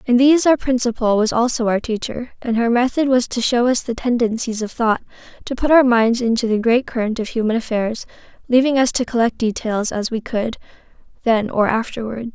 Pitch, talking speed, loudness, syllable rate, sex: 235 Hz, 200 wpm, -18 LUFS, 5.5 syllables/s, female